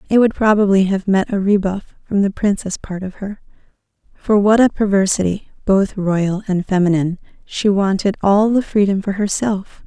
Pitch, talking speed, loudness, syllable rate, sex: 200 Hz, 170 wpm, -17 LUFS, 5.0 syllables/s, female